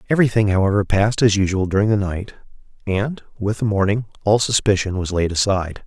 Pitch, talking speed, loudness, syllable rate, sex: 100 Hz, 175 wpm, -19 LUFS, 6.2 syllables/s, male